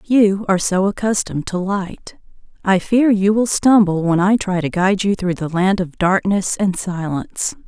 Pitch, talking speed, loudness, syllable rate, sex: 190 Hz, 190 wpm, -17 LUFS, 4.7 syllables/s, female